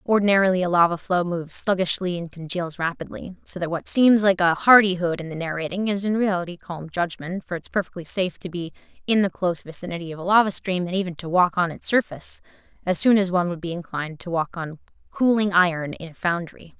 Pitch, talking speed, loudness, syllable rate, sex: 180 Hz, 215 wpm, -22 LUFS, 6.1 syllables/s, female